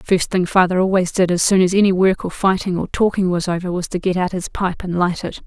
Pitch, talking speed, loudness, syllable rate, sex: 185 Hz, 275 wpm, -18 LUFS, 5.8 syllables/s, female